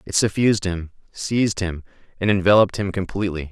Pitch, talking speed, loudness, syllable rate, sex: 95 Hz, 155 wpm, -21 LUFS, 6.3 syllables/s, male